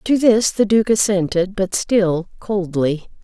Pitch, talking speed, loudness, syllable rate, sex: 195 Hz, 150 wpm, -17 LUFS, 3.7 syllables/s, female